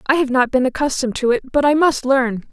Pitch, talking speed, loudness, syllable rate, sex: 265 Hz, 260 wpm, -17 LUFS, 6.3 syllables/s, female